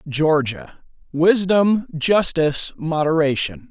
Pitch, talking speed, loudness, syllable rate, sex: 165 Hz, 50 wpm, -18 LUFS, 3.5 syllables/s, male